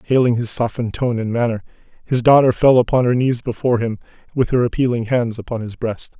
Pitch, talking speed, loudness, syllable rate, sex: 120 Hz, 205 wpm, -18 LUFS, 6.1 syllables/s, male